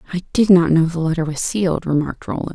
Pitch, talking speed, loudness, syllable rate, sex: 170 Hz, 235 wpm, -18 LUFS, 6.9 syllables/s, female